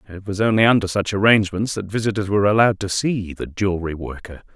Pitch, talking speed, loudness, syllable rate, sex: 100 Hz, 195 wpm, -19 LUFS, 6.6 syllables/s, male